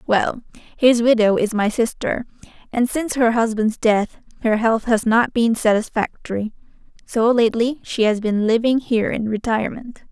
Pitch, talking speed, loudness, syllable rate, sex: 230 Hz, 155 wpm, -19 LUFS, 4.9 syllables/s, female